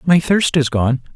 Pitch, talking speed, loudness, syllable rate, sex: 150 Hz, 205 wpm, -16 LUFS, 4.2 syllables/s, male